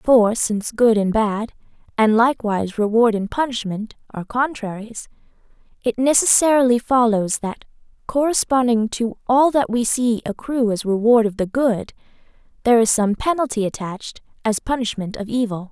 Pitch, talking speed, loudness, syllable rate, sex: 230 Hz, 140 wpm, -19 LUFS, 5.0 syllables/s, female